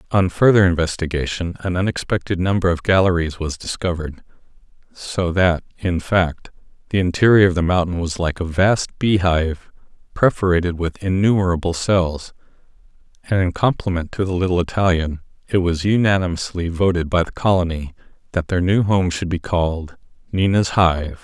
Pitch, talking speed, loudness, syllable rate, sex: 90 Hz, 145 wpm, -19 LUFS, 5.2 syllables/s, male